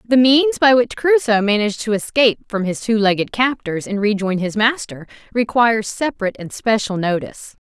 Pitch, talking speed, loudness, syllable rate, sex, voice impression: 225 Hz, 170 wpm, -17 LUFS, 5.5 syllables/s, female, feminine, adult-like, tensed, powerful, bright, clear, intellectual, calm, friendly, elegant, lively, slightly intense